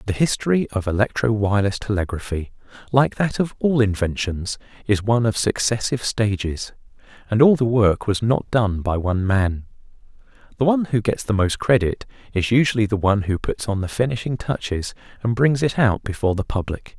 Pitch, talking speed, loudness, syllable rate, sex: 110 Hz, 175 wpm, -21 LUFS, 5.5 syllables/s, male